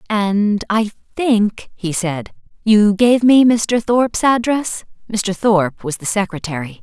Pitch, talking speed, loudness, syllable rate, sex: 210 Hz, 140 wpm, -16 LUFS, 3.8 syllables/s, female